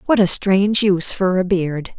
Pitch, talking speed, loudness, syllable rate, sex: 190 Hz, 210 wpm, -17 LUFS, 4.9 syllables/s, female